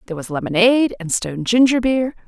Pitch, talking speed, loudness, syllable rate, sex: 215 Hz, 185 wpm, -17 LUFS, 6.4 syllables/s, female